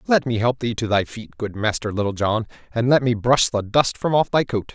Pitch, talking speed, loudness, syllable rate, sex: 115 Hz, 265 wpm, -21 LUFS, 5.3 syllables/s, male